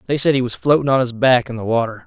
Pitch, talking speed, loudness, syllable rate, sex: 125 Hz, 320 wpm, -17 LUFS, 6.8 syllables/s, male